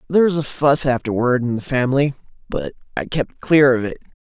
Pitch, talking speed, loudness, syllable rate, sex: 135 Hz, 200 wpm, -19 LUFS, 5.8 syllables/s, male